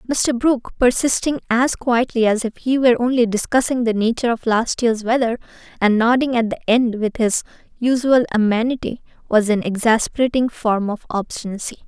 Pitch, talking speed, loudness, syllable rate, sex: 235 Hz, 160 wpm, -18 LUFS, 5.4 syllables/s, female